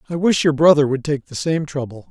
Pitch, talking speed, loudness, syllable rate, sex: 150 Hz, 255 wpm, -18 LUFS, 5.8 syllables/s, male